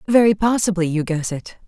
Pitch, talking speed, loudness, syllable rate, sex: 190 Hz, 180 wpm, -19 LUFS, 5.6 syllables/s, female